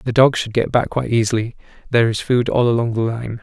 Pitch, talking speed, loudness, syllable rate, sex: 115 Hz, 245 wpm, -18 LUFS, 6.4 syllables/s, male